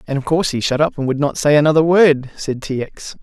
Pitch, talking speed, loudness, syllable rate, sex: 145 Hz, 280 wpm, -16 LUFS, 6.0 syllables/s, male